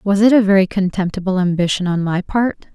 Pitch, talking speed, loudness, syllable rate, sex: 190 Hz, 195 wpm, -16 LUFS, 5.7 syllables/s, female